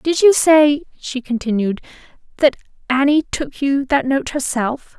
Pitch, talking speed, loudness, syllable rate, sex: 275 Hz, 145 wpm, -17 LUFS, 4.2 syllables/s, female